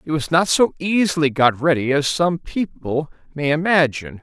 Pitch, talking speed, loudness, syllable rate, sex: 155 Hz, 170 wpm, -19 LUFS, 5.0 syllables/s, male